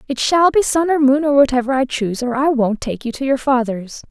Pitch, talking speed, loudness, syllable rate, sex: 265 Hz, 265 wpm, -16 LUFS, 5.6 syllables/s, female